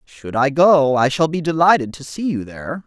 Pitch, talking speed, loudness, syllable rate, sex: 145 Hz, 230 wpm, -17 LUFS, 5.1 syllables/s, male